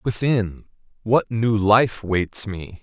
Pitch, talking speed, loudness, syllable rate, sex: 105 Hz, 130 wpm, -21 LUFS, 3.0 syllables/s, male